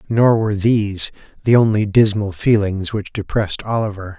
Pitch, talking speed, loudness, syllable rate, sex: 105 Hz, 145 wpm, -17 LUFS, 5.2 syllables/s, male